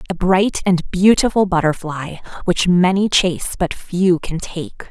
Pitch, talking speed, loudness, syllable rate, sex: 180 Hz, 145 wpm, -17 LUFS, 4.2 syllables/s, female